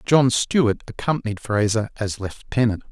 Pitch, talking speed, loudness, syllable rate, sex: 115 Hz, 125 wpm, -22 LUFS, 4.5 syllables/s, male